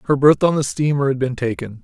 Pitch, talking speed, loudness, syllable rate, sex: 135 Hz, 260 wpm, -18 LUFS, 6.1 syllables/s, male